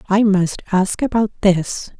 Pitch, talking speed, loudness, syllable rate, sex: 200 Hz, 150 wpm, -17 LUFS, 3.9 syllables/s, female